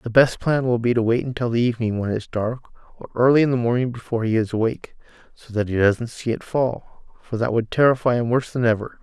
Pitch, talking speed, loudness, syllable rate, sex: 120 Hz, 255 wpm, -21 LUFS, 6.1 syllables/s, male